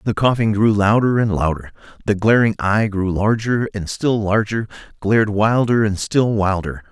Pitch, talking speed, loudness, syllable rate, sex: 105 Hz, 165 wpm, -18 LUFS, 4.6 syllables/s, male